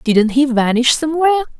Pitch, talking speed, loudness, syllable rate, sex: 270 Hz, 150 wpm, -14 LUFS, 6.3 syllables/s, female